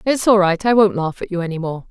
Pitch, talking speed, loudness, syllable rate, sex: 190 Hz, 315 wpm, -17 LUFS, 6.2 syllables/s, female